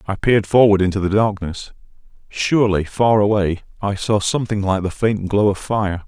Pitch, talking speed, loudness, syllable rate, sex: 100 Hz, 180 wpm, -18 LUFS, 5.2 syllables/s, male